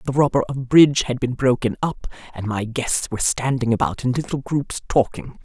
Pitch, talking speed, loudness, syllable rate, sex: 125 Hz, 200 wpm, -20 LUFS, 5.4 syllables/s, female